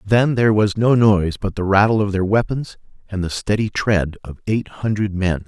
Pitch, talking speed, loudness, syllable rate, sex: 100 Hz, 210 wpm, -18 LUFS, 5.1 syllables/s, male